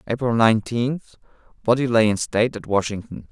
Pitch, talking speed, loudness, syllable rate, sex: 115 Hz, 145 wpm, -21 LUFS, 5.6 syllables/s, male